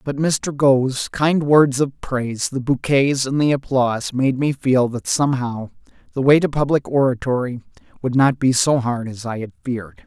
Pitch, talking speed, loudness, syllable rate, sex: 130 Hz, 185 wpm, -19 LUFS, 4.7 syllables/s, male